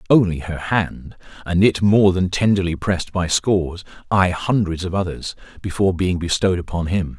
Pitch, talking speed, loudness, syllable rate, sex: 90 Hz, 150 wpm, -19 LUFS, 5.2 syllables/s, male